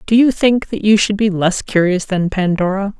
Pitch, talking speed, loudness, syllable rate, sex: 200 Hz, 220 wpm, -15 LUFS, 4.9 syllables/s, female